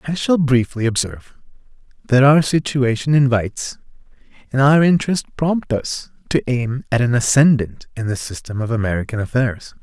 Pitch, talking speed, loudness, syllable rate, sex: 125 Hz, 145 wpm, -18 LUFS, 5.1 syllables/s, male